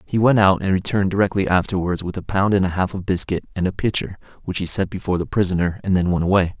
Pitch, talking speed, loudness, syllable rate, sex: 95 Hz, 255 wpm, -20 LUFS, 6.8 syllables/s, male